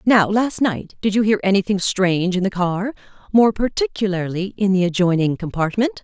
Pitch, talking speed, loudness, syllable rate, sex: 200 Hz, 170 wpm, -19 LUFS, 5.2 syllables/s, female